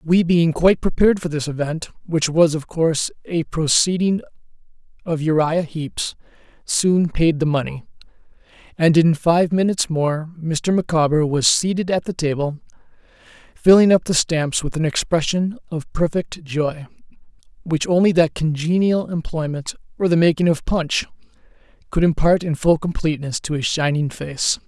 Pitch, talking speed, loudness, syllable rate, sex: 165 Hz, 150 wpm, -19 LUFS, 4.8 syllables/s, male